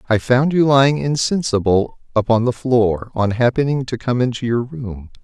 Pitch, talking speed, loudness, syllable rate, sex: 120 Hz, 170 wpm, -17 LUFS, 4.8 syllables/s, male